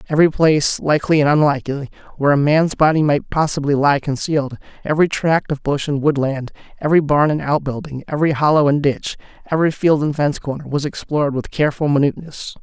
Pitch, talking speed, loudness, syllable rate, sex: 145 Hz, 180 wpm, -17 LUFS, 6.5 syllables/s, male